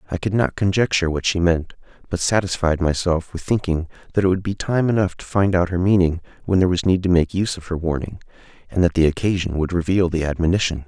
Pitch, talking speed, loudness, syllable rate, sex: 90 Hz, 225 wpm, -20 LUFS, 6.3 syllables/s, male